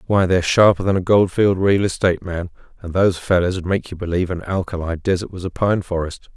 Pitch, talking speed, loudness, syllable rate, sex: 90 Hz, 215 wpm, -19 LUFS, 6.1 syllables/s, male